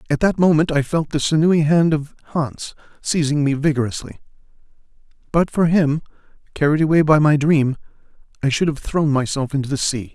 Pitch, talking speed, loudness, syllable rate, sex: 150 Hz, 170 wpm, -18 LUFS, 5.6 syllables/s, male